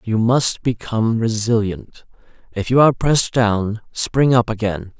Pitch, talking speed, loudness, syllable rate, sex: 115 Hz, 145 wpm, -18 LUFS, 4.4 syllables/s, male